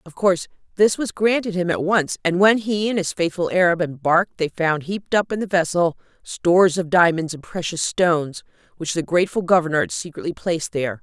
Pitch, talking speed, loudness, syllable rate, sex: 175 Hz, 200 wpm, -20 LUFS, 5.7 syllables/s, female